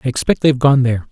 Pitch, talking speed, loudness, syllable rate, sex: 130 Hz, 270 wpm, -14 LUFS, 7.9 syllables/s, male